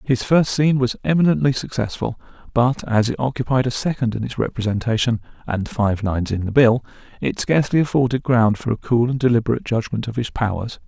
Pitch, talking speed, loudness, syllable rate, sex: 120 Hz, 190 wpm, -20 LUFS, 5.6 syllables/s, male